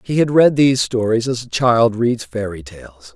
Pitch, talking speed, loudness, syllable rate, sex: 115 Hz, 210 wpm, -16 LUFS, 4.6 syllables/s, male